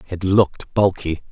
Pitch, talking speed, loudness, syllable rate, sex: 90 Hz, 135 wpm, -19 LUFS, 4.5 syllables/s, male